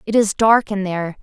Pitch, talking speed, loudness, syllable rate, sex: 205 Hz, 245 wpm, -17 LUFS, 5.8 syllables/s, female